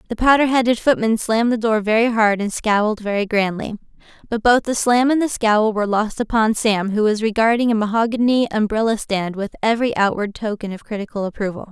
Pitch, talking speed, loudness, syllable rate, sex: 220 Hz, 195 wpm, -18 LUFS, 5.9 syllables/s, female